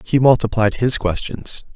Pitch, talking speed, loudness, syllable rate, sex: 115 Hz, 135 wpm, -18 LUFS, 4.4 syllables/s, male